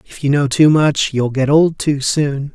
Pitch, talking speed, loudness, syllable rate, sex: 145 Hz, 235 wpm, -15 LUFS, 4.3 syllables/s, male